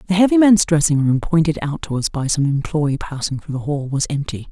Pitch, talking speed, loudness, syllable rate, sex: 155 Hz, 240 wpm, -18 LUFS, 5.6 syllables/s, female